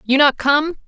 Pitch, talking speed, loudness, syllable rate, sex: 285 Hz, 205 wpm, -16 LUFS, 4.2 syllables/s, female